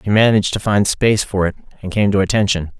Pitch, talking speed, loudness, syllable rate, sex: 100 Hz, 235 wpm, -16 LUFS, 6.6 syllables/s, male